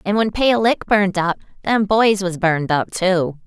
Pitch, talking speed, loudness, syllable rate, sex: 190 Hz, 210 wpm, -18 LUFS, 4.7 syllables/s, female